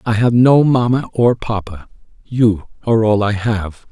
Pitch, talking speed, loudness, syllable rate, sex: 110 Hz, 170 wpm, -15 LUFS, 4.3 syllables/s, male